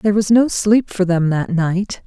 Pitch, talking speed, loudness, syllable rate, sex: 195 Hz, 230 wpm, -16 LUFS, 4.5 syllables/s, female